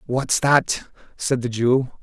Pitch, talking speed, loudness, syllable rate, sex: 130 Hz, 150 wpm, -21 LUFS, 3.2 syllables/s, male